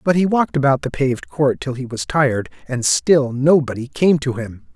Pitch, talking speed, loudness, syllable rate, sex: 135 Hz, 215 wpm, -18 LUFS, 5.2 syllables/s, male